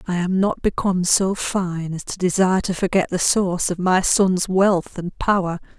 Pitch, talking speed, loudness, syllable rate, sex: 185 Hz, 195 wpm, -20 LUFS, 4.8 syllables/s, female